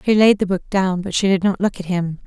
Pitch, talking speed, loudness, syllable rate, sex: 190 Hz, 320 wpm, -18 LUFS, 5.7 syllables/s, female